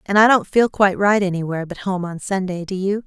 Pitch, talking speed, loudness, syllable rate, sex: 190 Hz, 255 wpm, -19 LUFS, 6.1 syllables/s, female